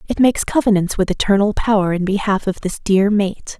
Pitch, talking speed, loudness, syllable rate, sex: 200 Hz, 200 wpm, -17 LUFS, 5.6 syllables/s, female